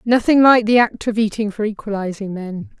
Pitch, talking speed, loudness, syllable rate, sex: 215 Hz, 195 wpm, -17 LUFS, 5.3 syllables/s, female